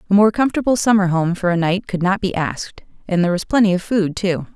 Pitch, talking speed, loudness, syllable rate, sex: 190 Hz, 250 wpm, -18 LUFS, 6.4 syllables/s, female